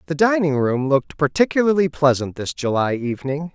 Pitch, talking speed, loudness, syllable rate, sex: 150 Hz, 150 wpm, -19 LUFS, 5.6 syllables/s, male